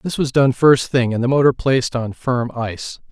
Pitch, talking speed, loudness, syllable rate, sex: 125 Hz, 230 wpm, -17 LUFS, 5.0 syllables/s, male